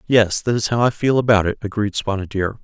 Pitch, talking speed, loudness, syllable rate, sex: 110 Hz, 250 wpm, -19 LUFS, 5.8 syllables/s, male